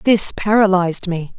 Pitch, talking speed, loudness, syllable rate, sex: 190 Hz, 130 wpm, -16 LUFS, 5.0 syllables/s, female